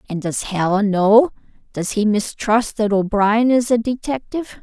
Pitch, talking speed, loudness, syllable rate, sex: 220 Hz, 155 wpm, -18 LUFS, 4.5 syllables/s, female